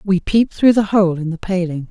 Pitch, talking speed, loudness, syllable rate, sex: 190 Hz, 250 wpm, -16 LUFS, 5.5 syllables/s, female